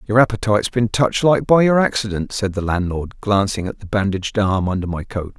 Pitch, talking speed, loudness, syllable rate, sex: 105 Hz, 210 wpm, -18 LUFS, 5.8 syllables/s, male